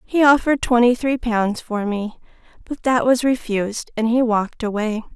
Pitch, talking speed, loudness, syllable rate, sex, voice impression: 235 Hz, 175 wpm, -19 LUFS, 4.9 syllables/s, female, feminine, adult-like, tensed, slightly powerful, bright, soft, slightly halting, slightly nasal, friendly, elegant, sweet, lively, slightly sharp